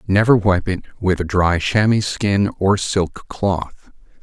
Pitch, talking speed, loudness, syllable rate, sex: 95 Hz, 155 wpm, -18 LUFS, 3.6 syllables/s, male